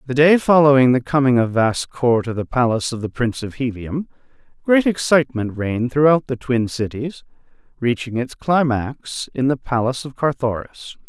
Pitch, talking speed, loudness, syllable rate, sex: 130 Hz, 170 wpm, -19 LUFS, 5.2 syllables/s, male